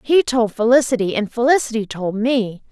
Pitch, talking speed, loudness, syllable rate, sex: 235 Hz, 155 wpm, -18 LUFS, 5.1 syllables/s, female